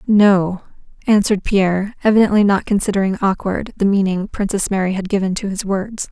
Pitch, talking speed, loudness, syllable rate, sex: 195 Hz, 155 wpm, -17 LUFS, 5.6 syllables/s, female